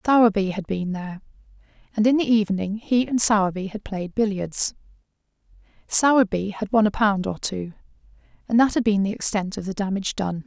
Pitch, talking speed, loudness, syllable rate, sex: 205 Hz, 180 wpm, -22 LUFS, 5.7 syllables/s, female